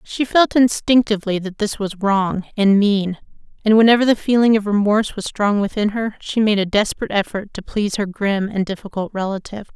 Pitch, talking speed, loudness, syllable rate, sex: 210 Hz, 190 wpm, -18 LUFS, 5.7 syllables/s, female